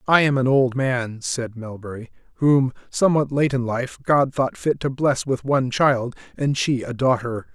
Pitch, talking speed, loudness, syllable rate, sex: 130 Hz, 190 wpm, -21 LUFS, 4.6 syllables/s, male